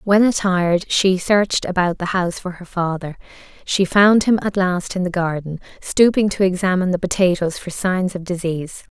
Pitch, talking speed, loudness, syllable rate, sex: 185 Hz, 180 wpm, -18 LUFS, 5.2 syllables/s, female